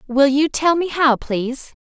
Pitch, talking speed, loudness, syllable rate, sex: 280 Hz, 195 wpm, -18 LUFS, 4.4 syllables/s, female